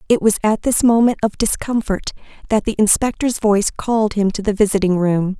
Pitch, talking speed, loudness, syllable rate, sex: 210 Hz, 190 wpm, -17 LUFS, 5.6 syllables/s, female